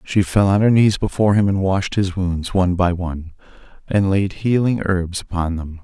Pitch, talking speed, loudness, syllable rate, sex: 95 Hz, 205 wpm, -18 LUFS, 5.0 syllables/s, male